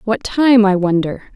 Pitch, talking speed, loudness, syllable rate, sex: 210 Hz, 175 wpm, -14 LUFS, 4.1 syllables/s, female